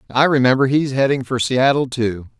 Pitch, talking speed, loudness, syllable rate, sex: 130 Hz, 175 wpm, -17 LUFS, 5.2 syllables/s, male